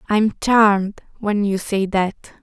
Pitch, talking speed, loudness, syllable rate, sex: 205 Hz, 150 wpm, -18 LUFS, 3.6 syllables/s, female